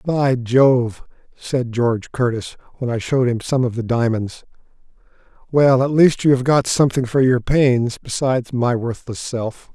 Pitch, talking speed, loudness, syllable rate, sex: 125 Hz, 165 wpm, -18 LUFS, 4.5 syllables/s, male